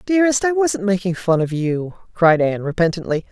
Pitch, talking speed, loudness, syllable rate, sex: 195 Hz, 180 wpm, -18 LUFS, 5.7 syllables/s, female